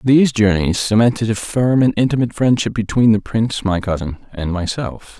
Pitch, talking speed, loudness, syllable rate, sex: 110 Hz, 175 wpm, -17 LUFS, 5.5 syllables/s, male